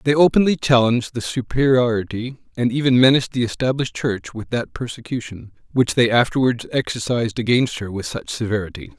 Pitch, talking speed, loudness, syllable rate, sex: 120 Hz, 155 wpm, -19 LUFS, 5.8 syllables/s, male